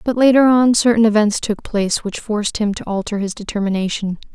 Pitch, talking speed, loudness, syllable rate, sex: 215 Hz, 195 wpm, -17 LUFS, 5.8 syllables/s, female